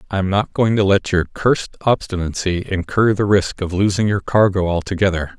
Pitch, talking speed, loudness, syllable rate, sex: 95 Hz, 190 wpm, -18 LUFS, 5.3 syllables/s, male